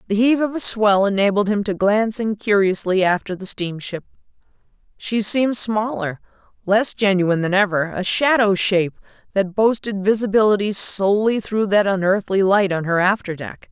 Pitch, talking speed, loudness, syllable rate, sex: 200 Hz, 155 wpm, -18 LUFS, 5.2 syllables/s, female